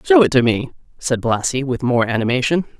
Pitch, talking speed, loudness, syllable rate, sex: 135 Hz, 195 wpm, -17 LUFS, 5.6 syllables/s, female